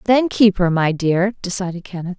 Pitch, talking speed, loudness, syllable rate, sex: 190 Hz, 195 wpm, -18 LUFS, 4.9 syllables/s, female